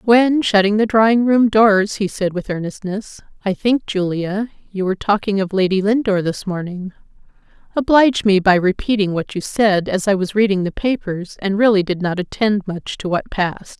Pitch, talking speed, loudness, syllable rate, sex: 200 Hz, 185 wpm, -17 LUFS, 5.1 syllables/s, female